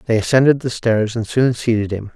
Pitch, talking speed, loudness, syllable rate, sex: 115 Hz, 225 wpm, -17 LUFS, 5.5 syllables/s, male